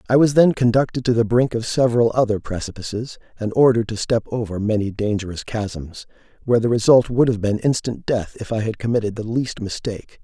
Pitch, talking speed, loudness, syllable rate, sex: 115 Hz, 200 wpm, -20 LUFS, 5.8 syllables/s, male